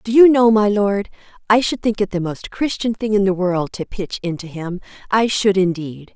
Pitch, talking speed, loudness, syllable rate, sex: 200 Hz, 225 wpm, -18 LUFS, 4.9 syllables/s, female